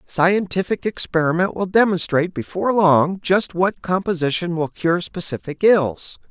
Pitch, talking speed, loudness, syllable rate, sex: 175 Hz, 125 wpm, -19 LUFS, 4.6 syllables/s, male